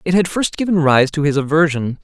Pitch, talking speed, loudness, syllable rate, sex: 160 Hz, 235 wpm, -16 LUFS, 5.7 syllables/s, male